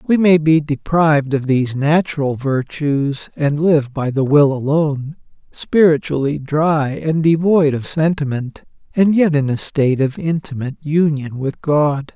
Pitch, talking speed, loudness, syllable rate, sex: 150 Hz, 150 wpm, -16 LUFS, 4.3 syllables/s, male